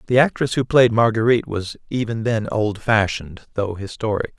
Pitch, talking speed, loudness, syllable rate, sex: 110 Hz, 150 wpm, -20 LUFS, 5.3 syllables/s, male